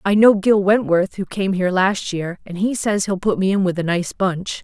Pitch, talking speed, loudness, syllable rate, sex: 190 Hz, 260 wpm, -18 LUFS, 4.9 syllables/s, female